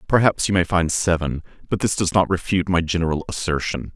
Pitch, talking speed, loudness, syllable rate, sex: 90 Hz, 195 wpm, -21 LUFS, 6.0 syllables/s, male